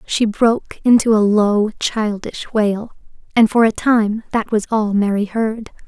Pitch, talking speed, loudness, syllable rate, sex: 215 Hz, 165 wpm, -17 LUFS, 4.0 syllables/s, female